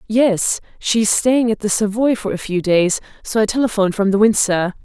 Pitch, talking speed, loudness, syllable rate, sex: 210 Hz, 200 wpm, -17 LUFS, 5.0 syllables/s, female